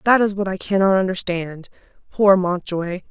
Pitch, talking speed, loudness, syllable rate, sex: 190 Hz, 155 wpm, -19 LUFS, 4.7 syllables/s, female